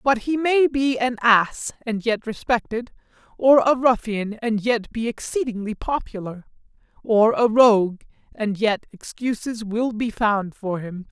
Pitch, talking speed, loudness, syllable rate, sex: 230 Hz, 150 wpm, -21 LUFS, 4.1 syllables/s, male